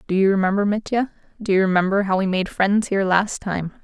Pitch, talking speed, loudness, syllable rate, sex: 195 Hz, 220 wpm, -20 LUFS, 6.0 syllables/s, female